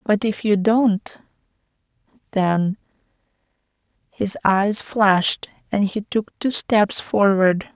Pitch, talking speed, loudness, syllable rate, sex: 205 Hz, 110 wpm, -19 LUFS, 3.3 syllables/s, female